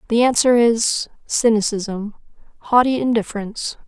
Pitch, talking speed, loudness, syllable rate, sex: 225 Hz, 75 wpm, -18 LUFS, 4.8 syllables/s, female